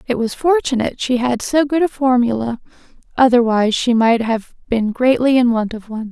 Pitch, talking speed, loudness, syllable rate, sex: 245 Hz, 185 wpm, -16 LUFS, 5.5 syllables/s, female